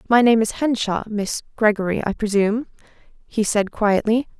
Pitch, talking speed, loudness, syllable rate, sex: 215 Hz, 135 wpm, -20 LUFS, 5.0 syllables/s, female